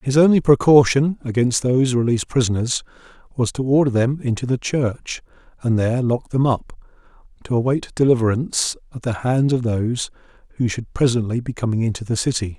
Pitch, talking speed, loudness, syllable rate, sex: 125 Hz, 165 wpm, -19 LUFS, 5.7 syllables/s, male